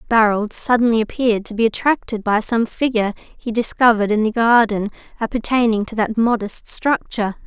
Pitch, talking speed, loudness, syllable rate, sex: 225 Hz, 155 wpm, -18 LUFS, 5.6 syllables/s, female